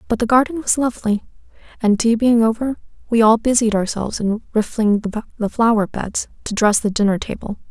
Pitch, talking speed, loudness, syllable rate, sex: 225 Hz, 170 wpm, -18 LUFS, 5.6 syllables/s, female